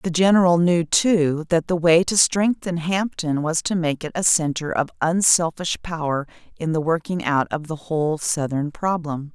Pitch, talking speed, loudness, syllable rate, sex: 165 Hz, 180 wpm, -20 LUFS, 4.5 syllables/s, female